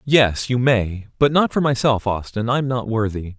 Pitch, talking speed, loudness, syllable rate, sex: 115 Hz, 175 wpm, -19 LUFS, 4.4 syllables/s, male